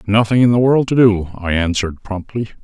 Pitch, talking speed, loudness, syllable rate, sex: 105 Hz, 205 wpm, -15 LUFS, 5.7 syllables/s, male